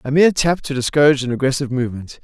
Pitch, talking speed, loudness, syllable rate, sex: 135 Hz, 215 wpm, -17 LUFS, 8.0 syllables/s, male